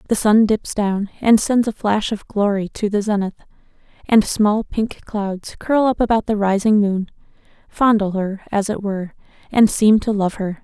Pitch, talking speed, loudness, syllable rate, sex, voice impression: 210 Hz, 185 wpm, -18 LUFS, 4.6 syllables/s, female, feminine, slightly adult-like, slightly fluent, cute, slightly kind